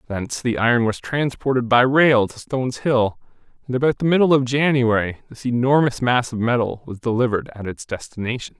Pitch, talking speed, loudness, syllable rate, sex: 120 Hz, 180 wpm, -20 LUFS, 5.6 syllables/s, male